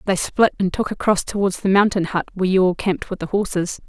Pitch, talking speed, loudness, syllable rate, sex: 190 Hz, 245 wpm, -20 LUFS, 6.2 syllables/s, female